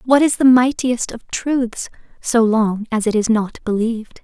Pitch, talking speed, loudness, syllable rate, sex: 235 Hz, 185 wpm, -17 LUFS, 4.2 syllables/s, female